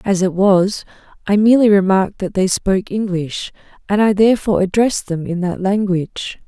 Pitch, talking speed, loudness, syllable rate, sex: 195 Hz, 165 wpm, -16 LUFS, 5.6 syllables/s, female